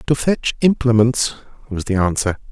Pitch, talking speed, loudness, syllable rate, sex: 120 Hz, 145 wpm, -18 LUFS, 4.6 syllables/s, male